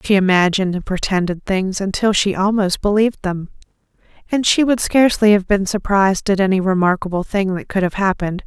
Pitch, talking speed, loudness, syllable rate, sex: 195 Hz, 175 wpm, -17 LUFS, 5.8 syllables/s, female